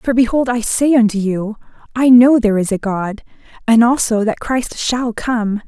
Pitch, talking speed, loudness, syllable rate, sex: 230 Hz, 190 wpm, -15 LUFS, 4.6 syllables/s, female